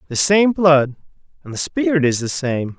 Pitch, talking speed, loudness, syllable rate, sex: 150 Hz, 195 wpm, -17 LUFS, 4.7 syllables/s, male